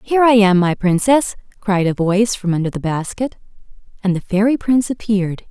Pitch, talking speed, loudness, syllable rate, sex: 205 Hz, 185 wpm, -17 LUFS, 5.7 syllables/s, female